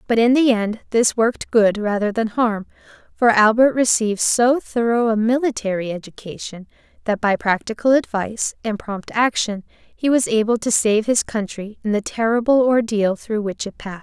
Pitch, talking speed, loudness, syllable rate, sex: 220 Hz, 170 wpm, -19 LUFS, 5.0 syllables/s, female